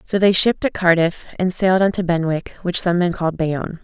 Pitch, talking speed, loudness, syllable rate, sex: 175 Hz, 220 wpm, -18 LUFS, 5.7 syllables/s, female